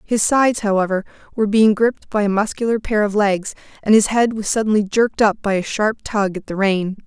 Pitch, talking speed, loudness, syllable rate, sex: 210 Hz, 220 wpm, -18 LUFS, 5.8 syllables/s, female